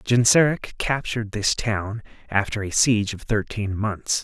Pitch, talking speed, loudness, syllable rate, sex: 110 Hz, 140 wpm, -22 LUFS, 4.5 syllables/s, male